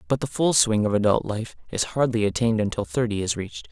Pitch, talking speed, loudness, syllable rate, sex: 115 Hz, 225 wpm, -23 LUFS, 6.2 syllables/s, male